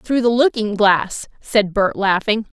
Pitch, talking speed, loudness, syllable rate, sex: 215 Hz, 160 wpm, -17 LUFS, 3.9 syllables/s, female